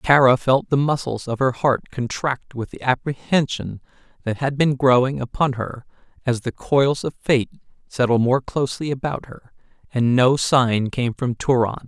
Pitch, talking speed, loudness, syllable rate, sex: 130 Hz, 165 wpm, -20 LUFS, 4.5 syllables/s, male